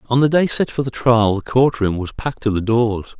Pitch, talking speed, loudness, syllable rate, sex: 120 Hz, 280 wpm, -18 LUFS, 5.3 syllables/s, male